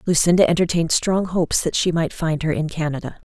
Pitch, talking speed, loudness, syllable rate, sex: 165 Hz, 200 wpm, -20 LUFS, 6.2 syllables/s, female